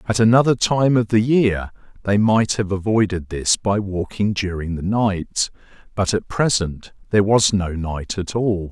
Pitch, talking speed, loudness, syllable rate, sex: 100 Hz, 170 wpm, -19 LUFS, 4.3 syllables/s, male